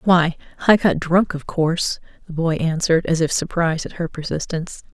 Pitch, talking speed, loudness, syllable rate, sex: 165 Hz, 180 wpm, -20 LUFS, 5.5 syllables/s, female